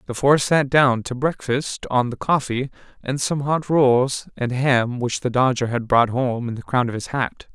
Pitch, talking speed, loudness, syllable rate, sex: 130 Hz, 215 wpm, -20 LUFS, 4.3 syllables/s, male